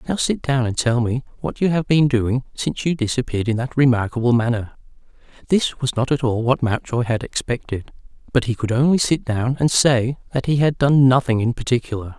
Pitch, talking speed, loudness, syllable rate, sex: 125 Hz, 205 wpm, -19 LUFS, 5.5 syllables/s, male